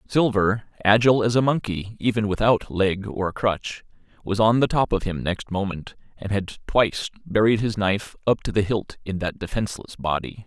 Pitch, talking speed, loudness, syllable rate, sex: 105 Hz, 185 wpm, -23 LUFS, 5.0 syllables/s, male